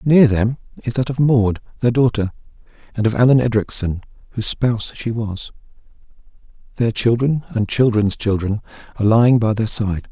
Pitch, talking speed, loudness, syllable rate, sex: 115 Hz, 155 wpm, -18 LUFS, 5.6 syllables/s, male